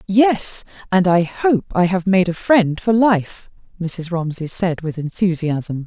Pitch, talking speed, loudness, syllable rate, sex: 185 Hz, 155 wpm, -18 LUFS, 3.7 syllables/s, female